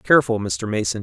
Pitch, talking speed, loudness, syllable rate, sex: 105 Hz, 175 wpm, -20 LUFS, 5.8 syllables/s, male